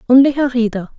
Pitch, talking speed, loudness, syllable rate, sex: 250 Hz, 185 wpm, -15 LUFS, 7.0 syllables/s, female